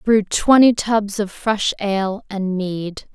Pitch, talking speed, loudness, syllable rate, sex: 205 Hz, 155 wpm, -18 LUFS, 3.4 syllables/s, female